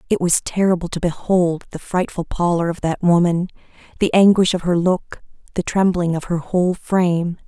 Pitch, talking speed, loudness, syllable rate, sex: 175 Hz, 175 wpm, -18 LUFS, 5.1 syllables/s, female